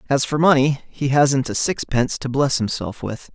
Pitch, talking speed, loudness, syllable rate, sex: 135 Hz, 200 wpm, -19 LUFS, 4.8 syllables/s, male